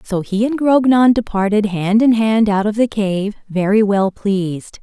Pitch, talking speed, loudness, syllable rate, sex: 210 Hz, 185 wpm, -15 LUFS, 4.3 syllables/s, female